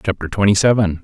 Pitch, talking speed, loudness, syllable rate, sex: 100 Hz, 175 wpm, -16 LUFS, 6.6 syllables/s, male